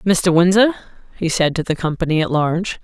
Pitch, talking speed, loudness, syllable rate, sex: 175 Hz, 190 wpm, -17 LUFS, 5.6 syllables/s, female